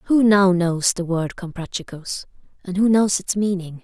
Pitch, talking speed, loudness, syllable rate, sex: 185 Hz, 170 wpm, -20 LUFS, 4.5 syllables/s, female